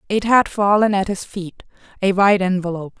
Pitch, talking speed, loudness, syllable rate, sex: 195 Hz, 160 wpm, -17 LUFS, 5.8 syllables/s, female